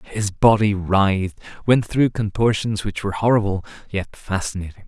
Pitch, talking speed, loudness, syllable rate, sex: 100 Hz, 135 wpm, -20 LUFS, 5.1 syllables/s, male